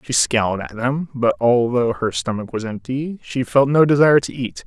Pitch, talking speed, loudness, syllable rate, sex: 125 Hz, 205 wpm, -19 LUFS, 5.0 syllables/s, male